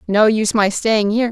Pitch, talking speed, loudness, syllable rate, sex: 215 Hz, 230 wpm, -16 LUFS, 6.1 syllables/s, female